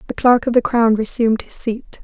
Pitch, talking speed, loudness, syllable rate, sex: 230 Hz, 235 wpm, -17 LUFS, 5.5 syllables/s, female